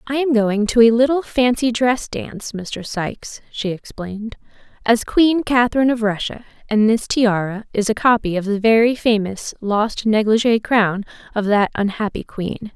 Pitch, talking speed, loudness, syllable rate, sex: 225 Hz, 165 wpm, -18 LUFS, 4.7 syllables/s, female